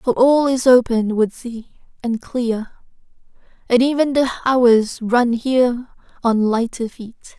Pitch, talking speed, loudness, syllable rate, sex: 240 Hz, 140 wpm, -17 LUFS, 3.6 syllables/s, female